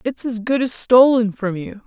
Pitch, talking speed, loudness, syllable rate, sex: 230 Hz, 225 wpm, -17 LUFS, 4.5 syllables/s, female